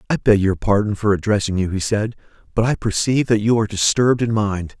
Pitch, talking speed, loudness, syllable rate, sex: 105 Hz, 225 wpm, -18 LUFS, 6.2 syllables/s, male